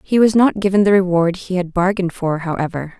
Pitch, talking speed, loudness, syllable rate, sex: 185 Hz, 220 wpm, -17 LUFS, 5.9 syllables/s, female